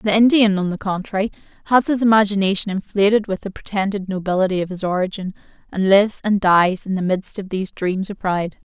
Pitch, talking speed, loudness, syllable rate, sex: 195 Hz, 195 wpm, -19 LUFS, 6.0 syllables/s, female